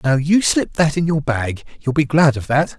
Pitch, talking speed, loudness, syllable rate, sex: 145 Hz, 260 wpm, -17 LUFS, 4.8 syllables/s, male